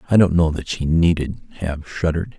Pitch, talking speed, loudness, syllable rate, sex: 85 Hz, 200 wpm, -20 LUFS, 5.1 syllables/s, male